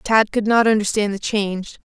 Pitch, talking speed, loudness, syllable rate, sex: 210 Hz, 190 wpm, -18 LUFS, 5.0 syllables/s, female